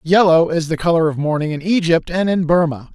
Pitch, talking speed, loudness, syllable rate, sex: 165 Hz, 225 wpm, -16 LUFS, 5.6 syllables/s, male